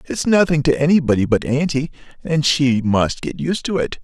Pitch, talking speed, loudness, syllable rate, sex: 145 Hz, 195 wpm, -18 LUFS, 5.0 syllables/s, male